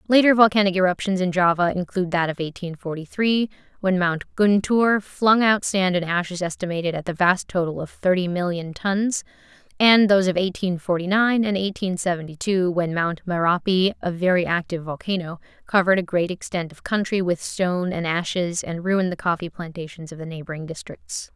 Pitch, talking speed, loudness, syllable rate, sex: 180 Hz, 180 wpm, -22 LUFS, 5.5 syllables/s, female